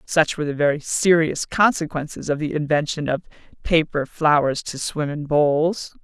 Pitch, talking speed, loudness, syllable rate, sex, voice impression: 150 Hz, 160 wpm, -21 LUFS, 4.8 syllables/s, female, very feminine, slightly gender-neutral, adult-like, slightly thin, tensed, powerful, bright, slightly soft, clear, fluent, slightly raspy, cool, very intellectual, refreshing, sincere, calm, very friendly, reassuring, unique, elegant, very wild, slightly sweet, lively, kind, slightly intense